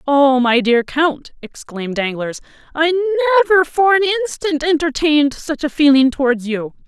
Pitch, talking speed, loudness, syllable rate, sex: 300 Hz, 150 wpm, -15 LUFS, 4.9 syllables/s, female